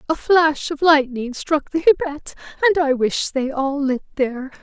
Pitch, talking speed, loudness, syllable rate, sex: 290 Hz, 180 wpm, -19 LUFS, 4.7 syllables/s, female